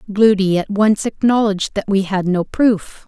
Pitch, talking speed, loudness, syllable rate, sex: 205 Hz, 175 wpm, -16 LUFS, 4.7 syllables/s, female